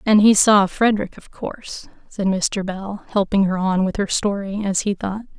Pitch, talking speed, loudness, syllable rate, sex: 200 Hz, 200 wpm, -19 LUFS, 4.7 syllables/s, female